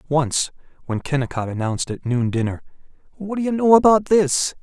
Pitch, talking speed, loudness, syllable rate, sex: 155 Hz, 170 wpm, -20 LUFS, 5.5 syllables/s, male